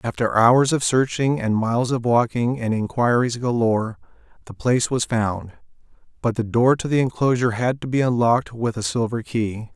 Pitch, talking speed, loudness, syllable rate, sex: 120 Hz, 180 wpm, -21 LUFS, 5.1 syllables/s, male